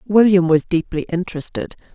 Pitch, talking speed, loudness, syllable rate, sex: 175 Hz, 125 wpm, -18 LUFS, 5.6 syllables/s, female